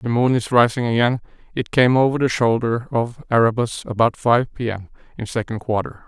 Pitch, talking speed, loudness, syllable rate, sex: 120 Hz, 190 wpm, -19 LUFS, 5.3 syllables/s, male